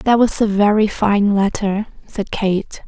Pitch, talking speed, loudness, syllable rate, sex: 205 Hz, 165 wpm, -17 LUFS, 3.8 syllables/s, female